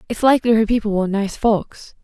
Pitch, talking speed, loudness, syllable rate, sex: 215 Hz, 205 wpm, -18 LUFS, 6.1 syllables/s, female